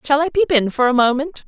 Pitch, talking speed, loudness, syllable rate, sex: 285 Hz, 285 wpm, -16 LUFS, 5.9 syllables/s, female